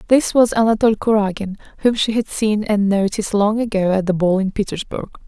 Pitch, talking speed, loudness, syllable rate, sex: 210 Hz, 195 wpm, -18 LUFS, 5.7 syllables/s, female